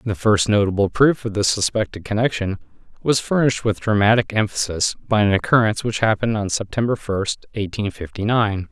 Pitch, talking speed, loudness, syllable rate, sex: 105 Hz, 165 wpm, -20 LUFS, 5.6 syllables/s, male